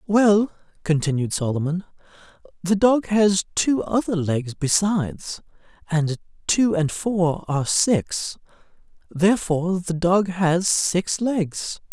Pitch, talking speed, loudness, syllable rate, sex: 180 Hz, 110 wpm, -21 LUFS, 3.7 syllables/s, male